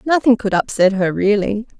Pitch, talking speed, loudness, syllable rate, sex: 215 Hz, 170 wpm, -16 LUFS, 5.0 syllables/s, female